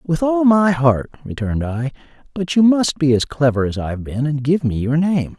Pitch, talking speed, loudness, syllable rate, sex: 150 Hz, 225 wpm, -18 LUFS, 5.0 syllables/s, male